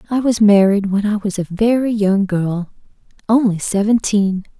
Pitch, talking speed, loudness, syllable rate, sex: 205 Hz, 145 wpm, -16 LUFS, 4.6 syllables/s, female